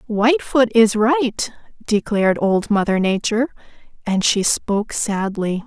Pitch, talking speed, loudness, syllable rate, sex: 220 Hz, 115 wpm, -18 LUFS, 4.2 syllables/s, female